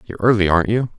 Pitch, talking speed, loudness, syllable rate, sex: 105 Hz, 245 wpm, -17 LUFS, 8.5 syllables/s, male